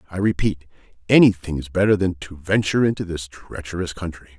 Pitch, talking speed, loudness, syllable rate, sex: 90 Hz, 165 wpm, -21 LUFS, 6.0 syllables/s, male